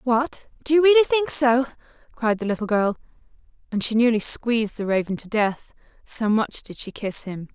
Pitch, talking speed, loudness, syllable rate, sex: 235 Hz, 190 wpm, -21 LUFS, 5.0 syllables/s, female